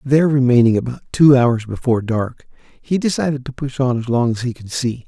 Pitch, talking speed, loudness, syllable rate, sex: 130 Hz, 215 wpm, -17 LUFS, 5.6 syllables/s, male